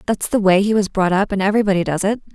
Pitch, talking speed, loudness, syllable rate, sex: 200 Hz, 280 wpm, -17 LUFS, 7.2 syllables/s, female